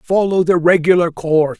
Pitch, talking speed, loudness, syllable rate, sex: 170 Hz, 150 wpm, -14 LUFS, 5.4 syllables/s, male